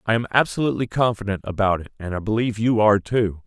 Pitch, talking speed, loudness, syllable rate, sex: 110 Hz, 210 wpm, -21 LUFS, 6.9 syllables/s, male